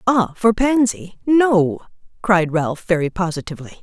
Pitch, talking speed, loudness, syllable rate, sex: 195 Hz, 125 wpm, -18 LUFS, 4.4 syllables/s, female